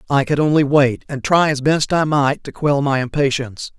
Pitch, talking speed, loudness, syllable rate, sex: 140 Hz, 220 wpm, -17 LUFS, 5.1 syllables/s, male